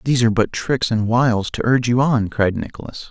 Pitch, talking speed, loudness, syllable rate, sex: 120 Hz, 230 wpm, -18 LUFS, 6.1 syllables/s, male